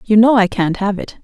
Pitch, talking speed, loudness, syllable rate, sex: 210 Hz, 290 wpm, -14 LUFS, 5.3 syllables/s, female